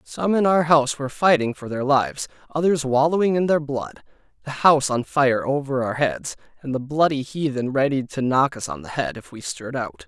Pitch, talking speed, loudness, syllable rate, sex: 140 Hz, 215 wpm, -21 LUFS, 5.5 syllables/s, male